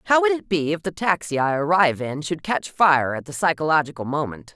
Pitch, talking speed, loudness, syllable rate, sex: 160 Hz, 225 wpm, -21 LUFS, 5.8 syllables/s, female